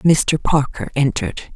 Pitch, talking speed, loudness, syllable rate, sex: 140 Hz, 115 wpm, -19 LUFS, 4.4 syllables/s, female